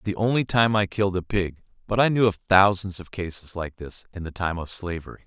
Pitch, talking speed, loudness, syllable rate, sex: 95 Hz, 260 wpm, -24 LUFS, 6.1 syllables/s, male